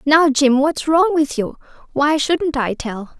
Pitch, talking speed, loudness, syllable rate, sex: 290 Hz, 170 wpm, -17 LUFS, 3.8 syllables/s, female